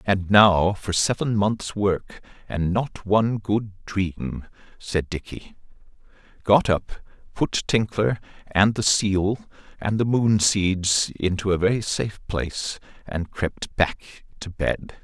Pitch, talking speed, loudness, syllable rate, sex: 100 Hz, 135 wpm, -23 LUFS, 3.5 syllables/s, male